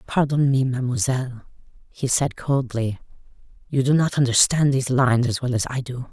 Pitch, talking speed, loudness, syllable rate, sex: 130 Hz, 165 wpm, -21 LUFS, 5.6 syllables/s, female